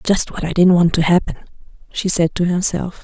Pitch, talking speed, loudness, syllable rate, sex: 175 Hz, 220 wpm, -16 LUFS, 5.4 syllables/s, female